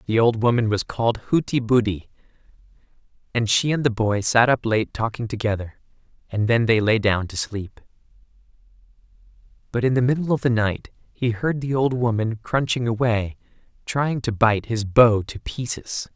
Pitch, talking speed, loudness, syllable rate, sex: 115 Hz, 165 wpm, -21 LUFS, 4.9 syllables/s, male